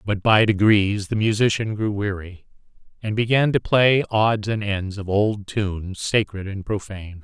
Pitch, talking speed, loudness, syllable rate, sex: 105 Hz, 165 wpm, -21 LUFS, 4.5 syllables/s, male